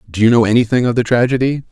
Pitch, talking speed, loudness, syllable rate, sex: 120 Hz, 245 wpm, -14 LUFS, 7.3 syllables/s, male